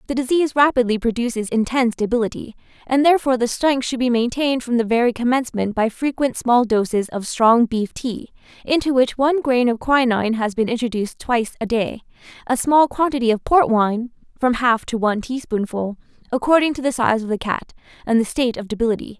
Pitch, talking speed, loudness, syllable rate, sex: 240 Hz, 190 wpm, -19 LUFS, 5.7 syllables/s, female